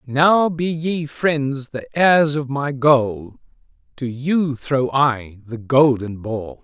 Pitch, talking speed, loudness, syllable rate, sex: 140 Hz, 145 wpm, -19 LUFS, 2.9 syllables/s, male